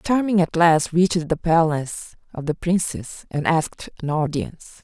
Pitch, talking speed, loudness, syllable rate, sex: 165 Hz, 160 wpm, -21 LUFS, 4.8 syllables/s, female